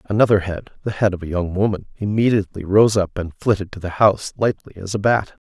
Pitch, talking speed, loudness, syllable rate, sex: 100 Hz, 195 wpm, -19 LUFS, 6.0 syllables/s, male